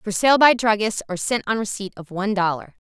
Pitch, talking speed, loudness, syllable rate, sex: 205 Hz, 230 wpm, -20 LUFS, 5.8 syllables/s, female